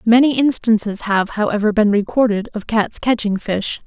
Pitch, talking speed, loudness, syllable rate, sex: 220 Hz, 155 wpm, -17 LUFS, 4.9 syllables/s, female